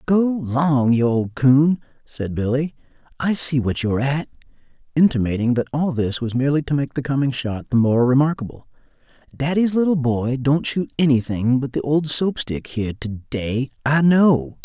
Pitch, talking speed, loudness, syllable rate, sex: 135 Hz, 170 wpm, -20 LUFS, 4.8 syllables/s, male